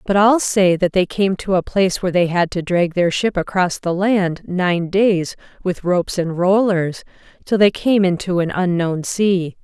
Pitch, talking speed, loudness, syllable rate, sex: 185 Hz, 200 wpm, -17 LUFS, 4.5 syllables/s, female